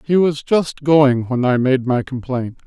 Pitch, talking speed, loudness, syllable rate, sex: 135 Hz, 205 wpm, -17 LUFS, 4.0 syllables/s, male